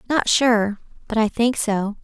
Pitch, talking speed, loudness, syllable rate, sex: 225 Hz, 175 wpm, -20 LUFS, 3.9 syllables/s, female